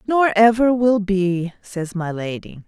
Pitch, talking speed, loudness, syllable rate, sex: 200 Hz, 155 wpm, -19 LUFS, 3.8 syllables/s, female